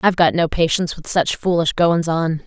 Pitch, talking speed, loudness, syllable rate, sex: 165 Hz, 220 wpm, -18 LUFS, 5.5 syllables/s, female